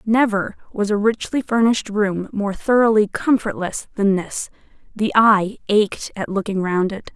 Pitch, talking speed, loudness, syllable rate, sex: 210 Hz, 145 wpm, -19 LUFS, 4.5 syllables/s, female